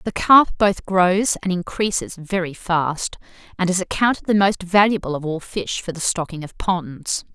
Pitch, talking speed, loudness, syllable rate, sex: 185 Hz, 180 wpm, -20 LUFS, 4.5 syllables/s, female